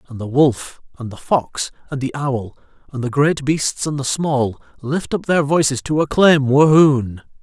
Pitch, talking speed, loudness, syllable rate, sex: 135 Hz, 185 wpm, -17 LUFS, 4.3 syllables/s, male